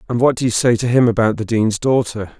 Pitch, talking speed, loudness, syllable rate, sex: 115 Hz, 275 wpm, -16 LUFS, 6.0 syllables/s, male